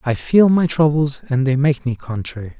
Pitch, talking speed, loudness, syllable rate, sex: 140 Hz, 210 wpm, -17 LUFS, 5.1 syllables/s, male